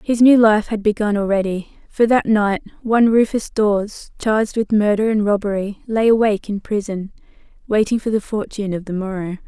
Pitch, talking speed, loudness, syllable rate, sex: 210 Hz, 175 wpm, -18 LUFS, 5.5 syllables/s, female